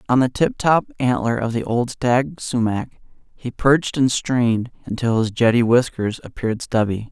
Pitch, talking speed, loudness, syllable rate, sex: 120 Hz, 170 wpm, -20 LUFS, 4.7 syllables/s, male